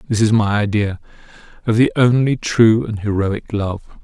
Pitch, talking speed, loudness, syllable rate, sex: 110 Hz, 165 wpm, -17 LUFS, 4.7 syllables/s, male